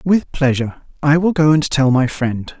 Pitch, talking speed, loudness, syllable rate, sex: 145 Hz, 210 wpm, -16 LUFS, 4.8 syllables/s, male